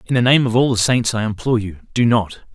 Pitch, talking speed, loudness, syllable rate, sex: 115 Hz, 285 wpm, -17 LUFS, 6.2 syllables/s, male